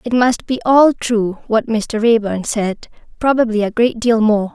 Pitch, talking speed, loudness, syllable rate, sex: 225 Hz, 170 wpm, -16 LUFS, 4.2 syllables/s, female